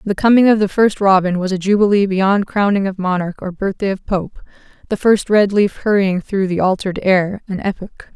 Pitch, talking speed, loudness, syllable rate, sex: 195 Hz, 205 wpm, -16 LUFS, 5.2 syllables/s, female